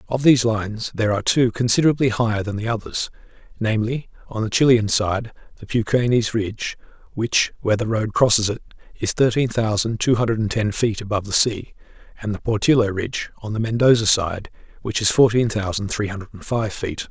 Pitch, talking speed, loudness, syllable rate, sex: 110 Hz, 180 wpm, -20 LUFS, 5.7 syllables/s, male